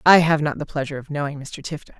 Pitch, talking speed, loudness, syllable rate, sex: 150 Hz, 270 wpm, -22 LUFS, 7.0 syllables/s, female